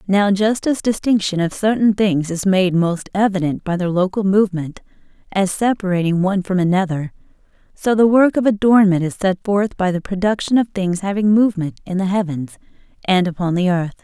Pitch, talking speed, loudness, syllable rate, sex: 190 Hz, 180 wpm, -17 LUFS, 5.4 syllables/s, female